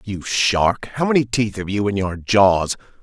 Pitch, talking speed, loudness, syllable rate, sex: 105 Hz, 200 wpm, -19 LUFS, 4.2 syllables/s, male